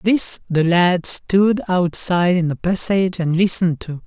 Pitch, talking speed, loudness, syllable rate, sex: 180 Hz, 160 wpm, -17 LUFS, 4.5 syllables/s, male